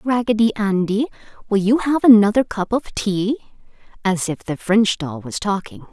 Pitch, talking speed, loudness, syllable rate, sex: 210 Hz, 160 wpm, -19 LUFS, 4.8 syllables/s, female